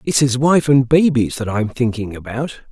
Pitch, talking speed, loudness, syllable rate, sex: 125 Hz, 200 wpm, -17 LUFS, 4.7 syllables/s, male